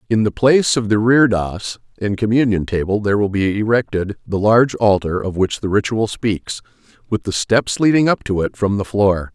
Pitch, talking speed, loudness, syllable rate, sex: 105 Hz, 200 wpm, -17 LUFS, 5.2 syllables/s, male